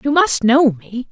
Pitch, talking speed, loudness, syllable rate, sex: 260 Hz, 215 wpm, -14 LUFS, 4.0 syllables/s, female